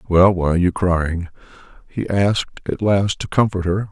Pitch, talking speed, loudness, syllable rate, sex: 95 Hz, 185 wpm, -19 LUFS, 4.8 syllables/s, male